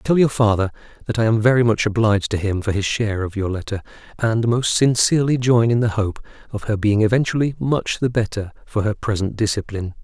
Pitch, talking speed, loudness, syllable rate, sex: 110 Hz, 210 wpm, -19 LUFS, 5.9 syllables/s, male